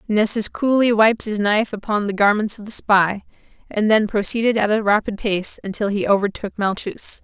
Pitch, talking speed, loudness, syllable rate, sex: 210 Hz, 180 wpm, -18 LUFS, 5.2 syllables/s, female